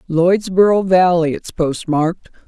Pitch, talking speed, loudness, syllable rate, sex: 175 Hz, 95 wpm, -15 LUFS, 4.1 syllables/s, female